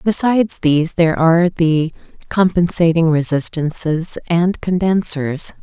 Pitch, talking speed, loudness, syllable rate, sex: 170 Hz, 95 wpm, -16 LUFS, 4.4 syllables/s, female